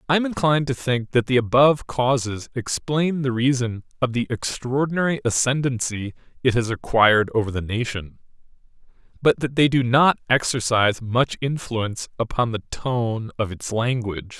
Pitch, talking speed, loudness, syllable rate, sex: 125 Hz, 150 wpm, -21 LUFS, 5.0 syllables/s, male